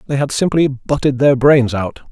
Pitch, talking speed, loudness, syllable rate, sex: 135 Hz, 200 wpm, -15 LUFS, 4.8 syllables/s, male